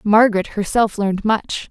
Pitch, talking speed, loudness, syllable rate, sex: 210 Hz, 140 wpm, -18 LUFS, 5.0 syllables/s, female